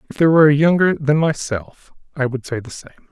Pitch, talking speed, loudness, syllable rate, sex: 145 Hz, 230 wpm, -17 LUFS, 6.4 syllables/s, male